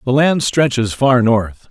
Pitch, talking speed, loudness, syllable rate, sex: 125 Hz, 175 wpm, -15 LUFS, 3.8 syllables/s, male